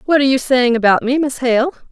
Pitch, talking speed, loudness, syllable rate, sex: 260 Hz, 250 wpm, -15 LUFS, 6.2 syllables/s, female